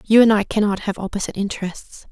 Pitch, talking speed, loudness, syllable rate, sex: 205 Hz, 200 wpm, -20 LUFS, 6.6 syllables/s, female